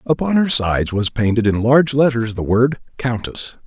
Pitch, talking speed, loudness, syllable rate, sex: 120 Hz, 180 wpm, -17 LUFS, 5.2 syllables/s, male